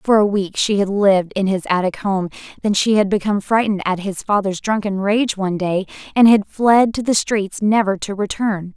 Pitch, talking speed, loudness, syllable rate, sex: 200 Hz, 210 wpm, -17 LUFS, 5.3 syllables/s, female